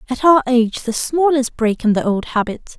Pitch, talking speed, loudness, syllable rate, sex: 250 Hz, 215 wpm, -17 LUFS, 5.4 syllables/s, female